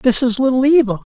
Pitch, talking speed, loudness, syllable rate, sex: 250 Hz, 215 wpm, -14 LUFS, 6.1 syllables/s, male